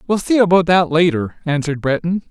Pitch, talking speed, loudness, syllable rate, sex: 170 Hz, 180 wpm, -16 LUFS, 5.9 syllables/s, male